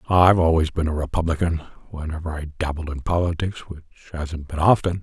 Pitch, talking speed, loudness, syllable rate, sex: 80 Hz, 165 wpm, -22 LUFS, 6.1 syllables/s, male